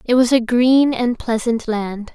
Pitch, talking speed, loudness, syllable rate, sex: 235 Hz, 195 wpm, -17 LUFS, 3.9 syllables/s, female